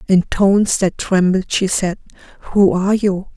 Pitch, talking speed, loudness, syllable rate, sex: 190 Hz, 160 wpm, -16 LUFS, 4.6 syllables/s, female